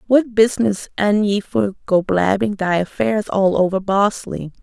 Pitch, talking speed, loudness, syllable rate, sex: 205 Hz, 155 wpm, -18 LUFS, 4.3 syllables/s, female